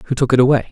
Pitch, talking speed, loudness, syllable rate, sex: 130 Hz, 335 wpm, -15 LUFS, 7.5 syllables/s, male